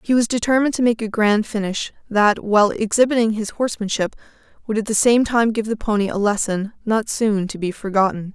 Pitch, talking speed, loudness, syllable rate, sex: 215 Hz, 200 wpm, -19 LUFS, 5.8 syllables/s, female